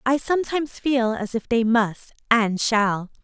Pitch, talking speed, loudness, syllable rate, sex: 235 Hz, 165 wpm, -22 LUFS, 4.4 syllables/s, female